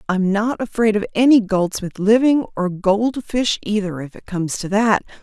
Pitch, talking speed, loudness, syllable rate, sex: 210 Hz, 160 wpm, -18 LUFS, 4.5 syllables/s, female